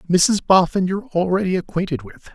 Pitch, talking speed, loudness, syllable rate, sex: 180 Hz, 155 wpm, -19 LUFS, 5.9 syllables/s, male